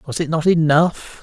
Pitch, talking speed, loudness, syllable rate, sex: 160 Hz, 195 wpm, -17 LUFS, 4.2 syllables/s, male